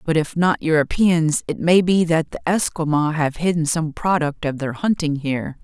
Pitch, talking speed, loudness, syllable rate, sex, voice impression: 160 Hz, 190 wpm, -19 LUFS, 4.8 syllables/s, female, feminine, gender-neutral, adult-like, slightly thin, tensed, slightly powerful, slightly dark, hard, very clear, fluent, very cool, very intellectual, refreshing, very sincere, slightly calm, very friendly, very reassuring, very unique, very elegant, wild, sweet, lively, slightly kind, intense, slightly light